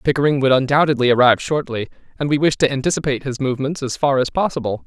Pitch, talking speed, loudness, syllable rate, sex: 135 Hz, 195 wpm, -18 LUFS, 7.1 syllables/s, male